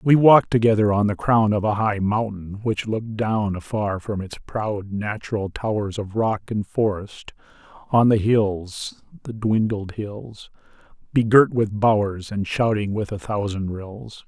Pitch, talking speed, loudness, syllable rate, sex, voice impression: 105 Hz, 160 wpm, -22 LUFS, 4.0 syllables/s, male, very masculine, very adult-like, old, very thick, tensed, very powerful, slightly bright, hard, slightly muffled, slightly fluent, very cool, very intellectual, very sincere, very calm, very mature, friendly, very reassuring, unique, very wild, sweet, slightly lively, very kind, slightly modest